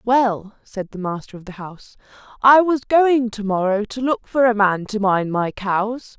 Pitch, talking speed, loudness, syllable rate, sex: 220 Hz, 195 wpm, -18 LUFS, 4.3 syllables/s, female